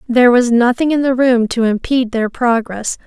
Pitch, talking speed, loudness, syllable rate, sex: 240 Hz, 195 wpm, -14 LUFS, 5.3 syllables/s, female